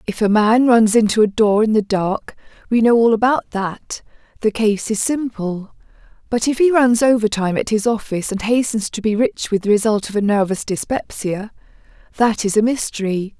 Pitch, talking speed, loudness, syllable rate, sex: 220 Hz, 180 wpm, -17 LUFS, 5.2 syllables/s, female